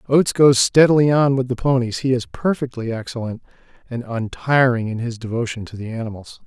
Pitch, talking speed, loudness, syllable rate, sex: 125 Hz, 165 wpm, -19 LUFS, 5.7 syllables/s, male